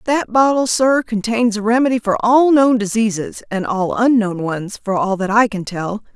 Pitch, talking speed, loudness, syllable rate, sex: 220 Hz, 195 wpm, -16 LUFS, 4.6 syllables/s, female